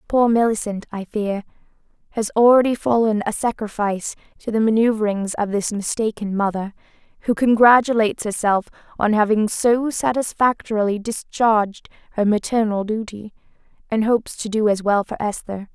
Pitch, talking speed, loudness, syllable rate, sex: 215 Hz, 135 wpm, -20 LUFS, 5.1 syllables/s, female